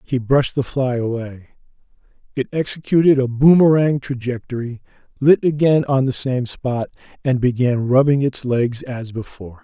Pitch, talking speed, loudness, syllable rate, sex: 130 Hz, 145 wpm, -18 LUFS, 4.9 syllables/s, male